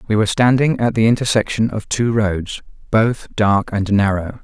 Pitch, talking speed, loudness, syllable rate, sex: 110 Hz, 175 wpm, -17 LUFS, 4.9 syllables/s, male